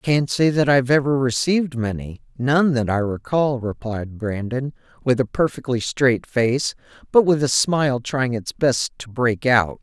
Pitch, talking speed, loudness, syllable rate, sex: 130 Hz, 175 wpm, -20 LUFS, 4.5 syllables/s, male